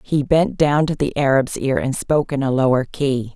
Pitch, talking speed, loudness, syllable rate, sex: 140 Hz, 235 wpm, -18 LUFS, 4.9 syllables/s, female